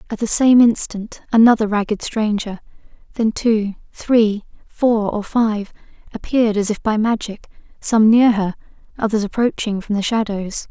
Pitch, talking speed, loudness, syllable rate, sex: 215 Hz, 145 wpm, -17 LUFS, 4.6 syllables/s, female